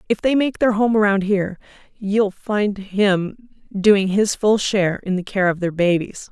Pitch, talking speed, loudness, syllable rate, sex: 200 Hz, 190 wpm, -19 LUFS, 4.4 syllables/s, female